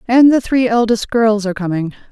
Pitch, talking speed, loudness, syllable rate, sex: 225 Hz, 200 wpm, -14 LUFS, 5.7 syllables/s, female